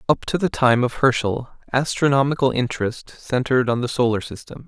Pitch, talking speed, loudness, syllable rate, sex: 125 Hz, 165 wpm, -20 LUFS, 5.4 syllables/s, male